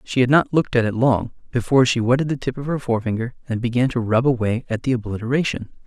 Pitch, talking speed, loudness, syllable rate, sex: 125 Hz, 235 wpm, -20 LUFS, 6.8 syllables/s, male